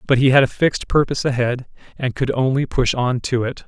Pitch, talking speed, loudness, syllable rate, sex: 130 Hz, 230 wpm, -19 LUFS, 5.8 syllables/s, male